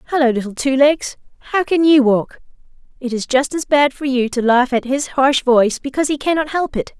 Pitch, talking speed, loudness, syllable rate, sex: 270 Hz, 225 wpm, -16 LUFS, 5.5 syllables/s, female